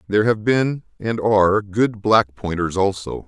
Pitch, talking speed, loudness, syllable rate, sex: 105 Hz, 165 wpm, -19 LUFS, 4.4 syllables/s, male